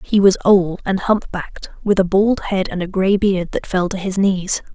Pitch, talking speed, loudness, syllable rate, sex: 190 Hz, 240 wpm, -17 LUFS, 4.6 syllables/s, female